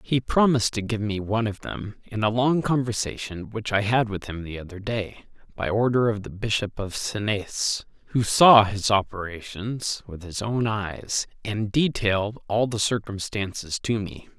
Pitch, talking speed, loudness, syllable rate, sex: 105 Hz, 175 wpm, -24 LUFS, 4.5 syllables/s, male